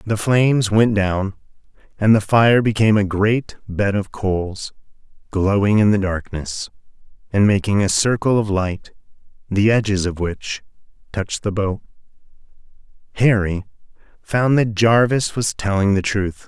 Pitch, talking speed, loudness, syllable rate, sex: 105 Hz, 140 wpm, -18 LUFS, 4.5 syllables/s, male